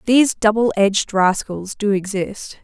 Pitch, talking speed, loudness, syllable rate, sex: 205 Hz, 135 wpm, -18 LUFS, 4.5 syllables/s, female